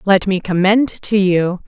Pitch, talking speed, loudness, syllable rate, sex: 195 Hz, 180 wpm, -15 LUFS, 3.8 syllables/s, female